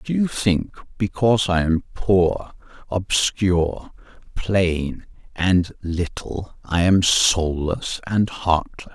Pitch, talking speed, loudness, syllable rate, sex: 90 Hz, 105 wpm, -21 LUFS, 3.2 syllables/s, male